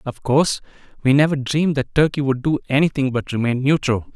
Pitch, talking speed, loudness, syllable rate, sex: 140 Hz, 190 wpm, -19 LUFS, 6.1 syllables/s, male